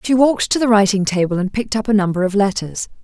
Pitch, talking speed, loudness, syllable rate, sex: 205 Hz, 255 wpm, -17 LUFS, 6.7 syllables/s, female